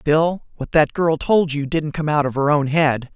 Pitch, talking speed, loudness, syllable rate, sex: 150 Hz, 245 wpm, -19 LUFS, 4.4 syllables/s, male